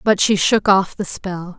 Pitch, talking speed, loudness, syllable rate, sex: 190 Hz, 225 wpm, -17 LUFS, 4.0 syllables/s, female